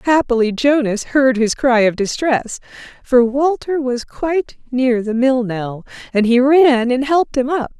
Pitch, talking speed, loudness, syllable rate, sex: 255 Hz, 170 wpm, -16 LUFS, 4.3 syllables/s, female